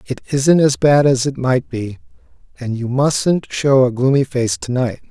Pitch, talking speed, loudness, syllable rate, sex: 130 Hz, 225 wpm, -16 LUFS, 4.6 syllables/s, male